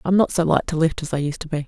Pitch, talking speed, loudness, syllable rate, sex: 160 Hz, 395 wpm, -21 LUFS, 7.0 syllables/s, female